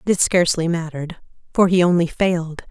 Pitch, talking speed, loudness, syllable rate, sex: 170 Hz, 180 wpm, -18 LUFS, 6.3 syllables/s, female